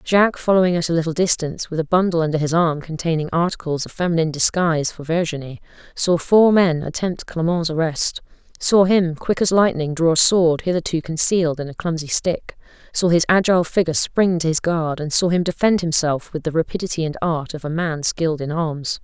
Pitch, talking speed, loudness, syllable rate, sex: 165 Hz, 190 wpm, -19 LUFS, 5.7 syllables/s, female